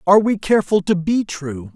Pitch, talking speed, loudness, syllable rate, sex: 185 Hz, 205 wpm, -18 LUFS, 5.6 syllables/s, male